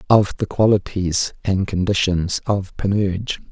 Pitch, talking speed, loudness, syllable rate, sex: 95 Hz, 120 wpm, -20 LUFS, 4.3 syllables/s, male